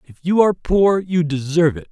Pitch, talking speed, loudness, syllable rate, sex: 170 Hz, 220 wpm, -17 LUFS, 5.7 syllables/s, male